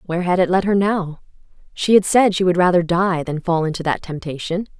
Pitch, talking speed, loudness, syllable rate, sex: 180 Hz, 225 wpm, -18 LUFS, 5.7 syllables/s, female